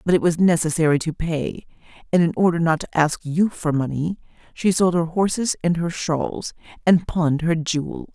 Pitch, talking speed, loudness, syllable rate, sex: 165 Hz, 190 wpm, -21 LUFS, 5.1 syllables/s, female